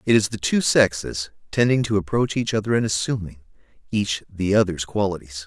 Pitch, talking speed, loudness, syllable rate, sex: 100 Hz, 175 wpm, -22 LUFS, 5.4 syllables/s, male